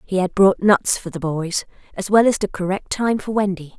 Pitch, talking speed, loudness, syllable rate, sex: 195 Hz, 240 wpm, -19 LUFS, 5.0 syllables/s, female